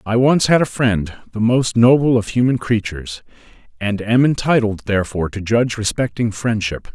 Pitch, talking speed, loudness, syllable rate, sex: 115 Hz, 165 wpm, -17 LUFS, 5.2 syllables/s, male